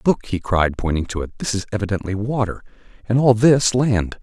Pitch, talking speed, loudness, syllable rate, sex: 105 Hz, 200 wpm, -19 LUFS, 5.3 syllables/s, male